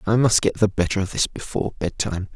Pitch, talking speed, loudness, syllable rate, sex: 100 Hz, 255 wpm, -22 LUFS, 6.1 syllables/s, male